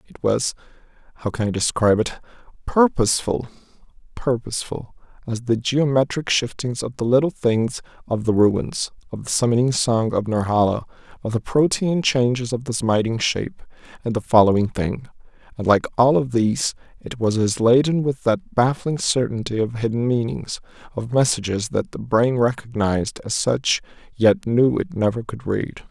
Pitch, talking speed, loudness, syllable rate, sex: 120 Hz, 155 wpm, -21 LUFS, 5.1 syllables/s, male